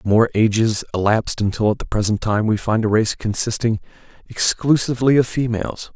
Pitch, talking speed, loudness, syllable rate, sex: 110 Hz, 160 wpm, -19 LUFS, 5.5 syllables/s, male